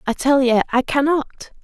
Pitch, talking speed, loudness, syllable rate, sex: 270 Hz, 185 wpm, -18 LUFS, 5.9 syllables/s, female